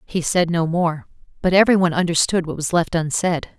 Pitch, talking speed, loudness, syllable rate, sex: 170 Hz, 185 wpm, -19 LUFS, 5.4 syllables/s, female